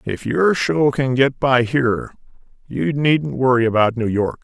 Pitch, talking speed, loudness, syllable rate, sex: 130 Hz, 175 wpm, -18 LUFS, 4.2 syllables/s, male